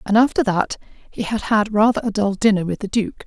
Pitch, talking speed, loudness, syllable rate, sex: 210 Hz, 240 wpm, -19 LUFS, 5.7 syllables/s, female